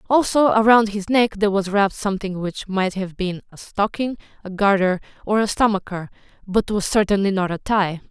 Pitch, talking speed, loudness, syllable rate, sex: 200 Hz, 185 wpm, -20 LUFS, 5.5 syllables/s, female